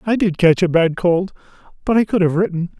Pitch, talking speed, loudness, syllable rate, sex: 180 Hz, 215 wpm, -16 LUFS, 5.7 syllables/s, male